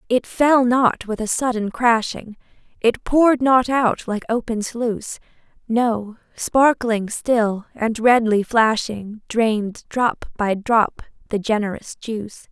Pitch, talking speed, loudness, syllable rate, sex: 230 Hz, 130 wpm, -19 LUFS, 3.7 syllables/s, female